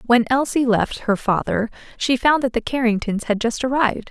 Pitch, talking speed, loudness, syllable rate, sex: 240 Hz, 190 wpm, -20 LUFS, 5.2 syllables/s, female